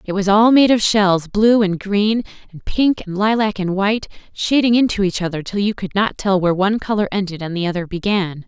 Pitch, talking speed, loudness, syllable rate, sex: 200 Hz, 225 wpm, -17 LUFS, 5.6 syllables/s, female